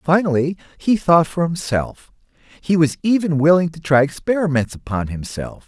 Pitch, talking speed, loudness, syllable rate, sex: 160 Hz, 150 wpm, -18 LUFS, 4.9 syllables/s, male